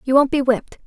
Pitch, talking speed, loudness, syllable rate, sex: 265 Hz, 275 wpm, -18 LUFS, 6.9 syllables/s, female